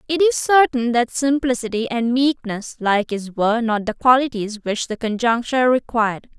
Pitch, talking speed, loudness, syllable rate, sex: 240 Hz, 160 wpm, -19 LUFS, 5.0 syllables/s, female